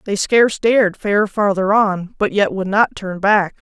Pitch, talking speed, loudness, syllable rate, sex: 205 Hz, 195 wpm, -16 LUFS, 4.4 syllables/s, female